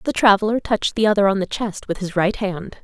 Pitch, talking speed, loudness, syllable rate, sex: 205 Hz, 255 wpm, -19 LUFS, 6.0 syllables/s, female